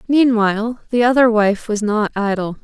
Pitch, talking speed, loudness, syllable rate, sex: 220 Hz, 160 wpm, -16 LUFS, 4.8 syllables/s, female